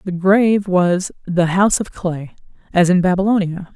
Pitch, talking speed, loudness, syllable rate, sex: 185 Hz, 160 wpm, -16 LUFS, 4.9 syllables/s, female